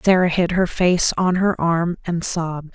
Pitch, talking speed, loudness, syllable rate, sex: 175 Hz, 195 wpm, -19 LUFS, 4.4 syllables/s, female